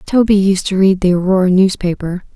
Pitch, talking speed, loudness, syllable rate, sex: 190 Hz, 180 wpm, -13 LUFS, 5.4 syllables/s, female